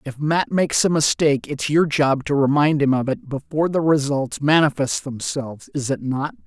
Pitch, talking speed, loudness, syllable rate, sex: 145 Hz, 195 wpm, -20 LUFS, 5.1 syllables/s, male